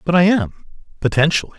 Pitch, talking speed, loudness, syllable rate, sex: 160 Hz, 150 wpm, -17 LUFS, 7.2 syllables/s, male